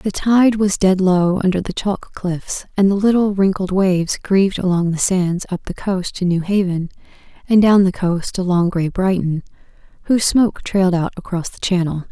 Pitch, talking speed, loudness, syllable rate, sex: 185 Hz, 190 wpm, -17 LUFS, 4.9 syllables/s, female